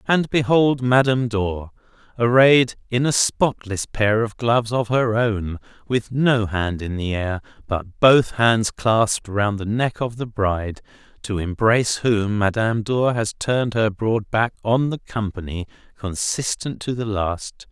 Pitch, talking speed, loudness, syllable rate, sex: 110 Hz, 160 wpm, -20 LUFS, 4.1 syllables/s, male